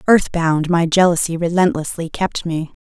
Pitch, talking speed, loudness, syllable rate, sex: 170 Hz, 150 wpm, -17 LUFS, 4.6 syllables/s, female